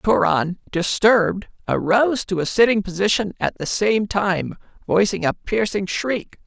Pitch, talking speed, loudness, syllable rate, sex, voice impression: 195 Hz, 140 wpm, -20 LUFS, 4.4 syllables/s, male, masculine, slightly young, slightly adult-like, slightly cool, intellectual, slightly refreshing, unique